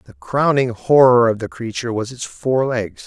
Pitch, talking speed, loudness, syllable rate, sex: 125 Hz, 175 wpm, -17 LUFS, 5.2 syllables/s, male